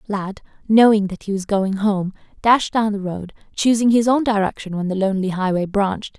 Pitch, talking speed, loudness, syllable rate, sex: 205 Hz, 195 wpm, -19 LUFS, 5.3 syllables/s, female